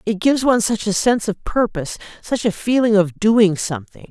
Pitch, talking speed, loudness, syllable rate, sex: 215 Hz, 205 wpm, -18 LUFS, 5.8 syllables/s, female